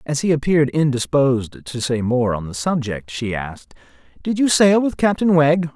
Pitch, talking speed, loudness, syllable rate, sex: 140 Hz, 190 wpm, -18 LUFS, 5.1 syllables/s, male